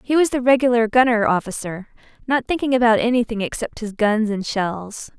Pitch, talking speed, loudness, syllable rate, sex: 230 Hz, 175 wpm, -19 LUFS, 5.4 syllables/s, female